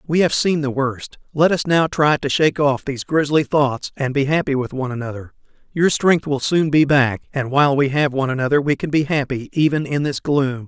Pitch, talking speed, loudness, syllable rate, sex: 140 Hz, 230 wpm, -18 LUFS, 5.5 syllables/s, male